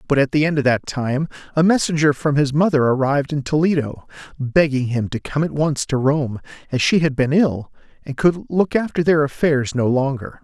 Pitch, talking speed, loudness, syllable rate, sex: 145 Hz, 205 wpm, -19 LUFS, 5.2 syllables/s, male